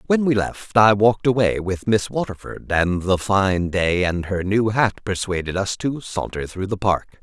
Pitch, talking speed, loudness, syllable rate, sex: 100 Hz, 200 wpm, -20 LUFS, 4.5 syllables/s, male